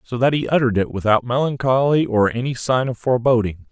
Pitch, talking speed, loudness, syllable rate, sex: 125 Hz, 195 wpm, -19 LUFS, 6.1 syllables/s, male